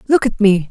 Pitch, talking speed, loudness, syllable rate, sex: 215 Hz, 255 wpm, -14 LUFS, 5.5 syllables/s, male